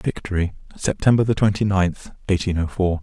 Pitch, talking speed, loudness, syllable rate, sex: 95 Hz, 140 wpm, -21 LUFS, 5.0 syllables/s, male